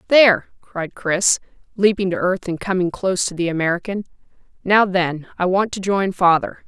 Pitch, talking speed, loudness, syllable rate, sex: 185 Hz, 170 wpm, -19 LUFS, 5.1 syllables/s, female